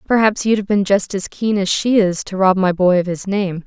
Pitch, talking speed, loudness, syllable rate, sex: 195 Hz, 280 wpm, -17 LUFS, 5.2 syllables/s, female